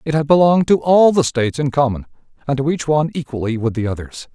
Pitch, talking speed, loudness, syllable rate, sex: 140 Hz, 235 wpm, -16 LUFS, 6.6 syllables/s, male